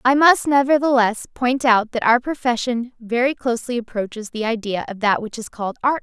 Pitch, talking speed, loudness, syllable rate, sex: 240 Hz, 190 wpm, -19 LUFS, 5.4 syllables/s, female